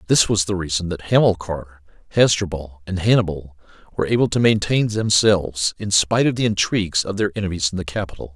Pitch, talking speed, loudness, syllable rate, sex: 95 Hz, 180 wpm, -19 LUFS, 6.0 syllables/s, male